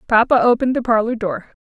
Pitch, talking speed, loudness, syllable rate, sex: 225 Hz, 185 wpm, -17 LUFS, 6.7 syllables/s, female